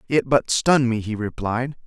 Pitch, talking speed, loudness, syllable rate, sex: 120 Hz, 195 wpm, -21 LUFS, 5.0 syllables/s, male